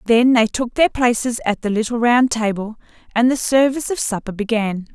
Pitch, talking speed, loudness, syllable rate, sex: 235 Hz, 195 wpm, -18 LUFS, 5.3 syllables/s, female